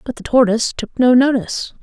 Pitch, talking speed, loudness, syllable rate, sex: 240 Hz, 195 wpm, -15 LUFS, 6.1 syllables/s, female